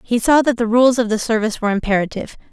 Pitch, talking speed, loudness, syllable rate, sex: 230 Hz, 240 wpm, -16 LUFS, 7.4 syllables/s, female